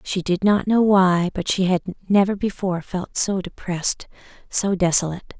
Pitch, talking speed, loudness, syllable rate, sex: 185 Hz, 165 wpm, -20 LUFS, 5.0 syllables/s, female